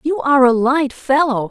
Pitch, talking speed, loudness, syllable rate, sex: 270 Hz, 200 wpm, -15 LUFS, 5.0 syllables/s, female